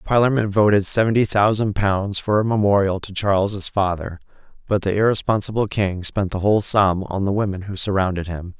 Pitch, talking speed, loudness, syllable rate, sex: 100 Hz, 175 wpm, -19 LUFS, 5.4 syllables/s, male